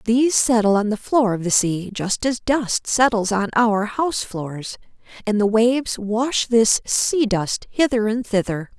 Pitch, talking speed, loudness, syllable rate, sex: 220 Hz, 180 wpm, -19 LUFS, 4.2 syllables/s, female